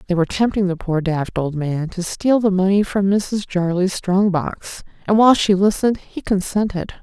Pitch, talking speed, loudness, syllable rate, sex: 190 Hz, 195 wpm, -18 LUFS, 5.0 syllables/s, female